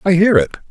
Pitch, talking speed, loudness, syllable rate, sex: 175 Hz, 255 wpm, -13 LUFS, 7.1 syllables/s, male